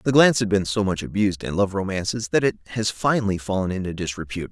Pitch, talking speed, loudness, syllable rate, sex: 100 Hz, 225 wpm, -22 LUFS, 6.9 syllables/s, male